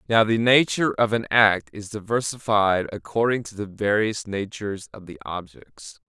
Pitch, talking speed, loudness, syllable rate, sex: 105 Hz, 160 wpm, -22 LUFS, 4.7 syllables/s, male